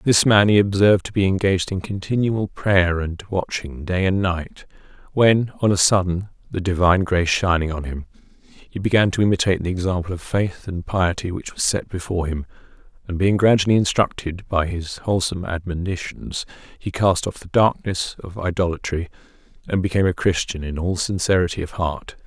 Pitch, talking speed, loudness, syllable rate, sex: 95 Hz, 170 wpm, -21 LUFS, 5.5 syllables/s, male